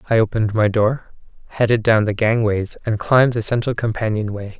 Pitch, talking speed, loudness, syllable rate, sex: 110 Hz, 170 wpm, -18 LUFS, 5.6 syllables/s, male